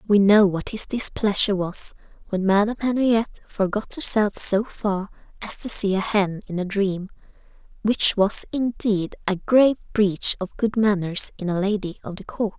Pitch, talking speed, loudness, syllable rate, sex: 205 Hz, 165 wpm, -21 LUFS, 4.7 syllables/s, female